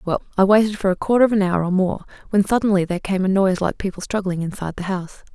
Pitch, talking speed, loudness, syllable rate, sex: 190 Hz, 260 wpm, -20 LUFS, 7.3 syllables/s, female